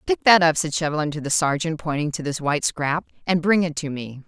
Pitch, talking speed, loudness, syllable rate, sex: 155 Hz, 255 wpm, -21 LUFS, 5.8 syllables/s, female